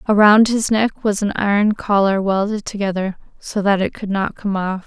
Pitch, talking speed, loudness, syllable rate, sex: 205 Hz, 195 wpm, -17 LUFS, 4.9 syllables/s, female